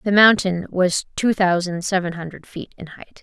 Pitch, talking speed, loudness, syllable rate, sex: 185 Hz, 185 wpm, -19 LUFS, 4.8 syllables/s, female